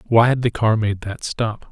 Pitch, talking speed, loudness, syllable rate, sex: 110 Hz, 245 wpm, -20 LUFS, 4.7 syllables/s, male